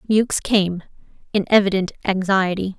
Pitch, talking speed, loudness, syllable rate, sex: 190 Hz, 110 wpm, -19 LUFS, 4.8 syllables/s, female